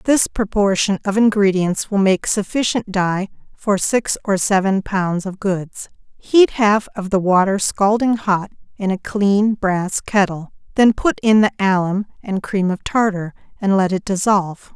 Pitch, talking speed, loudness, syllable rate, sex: 200 Hz, 165 wpm, -17 LUFS, 4.2 syllables/s, female